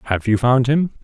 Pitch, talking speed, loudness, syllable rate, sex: 125 Hz, 230 wpm, -17 LUFS, 5.3 syllables/s, male